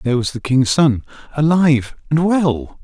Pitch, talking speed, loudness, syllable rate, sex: 140 Hz, 170 wpm, -16 LUFS, 4.7 syllables/s, male